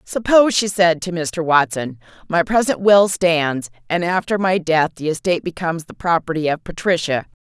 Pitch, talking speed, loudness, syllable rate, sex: 170 Hz, 170 wpm, -18 LUFS, 5.1 syllables/s, female